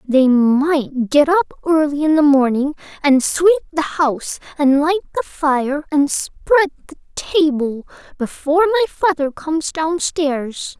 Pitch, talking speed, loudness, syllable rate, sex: 300 Hz, 140 wpm, -17 LUFS, 3.9 syllables/s, female